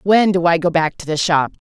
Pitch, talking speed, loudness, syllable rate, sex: 170 Hz, 295 wpm, -16 LUFS, 5.3 syllables/s, female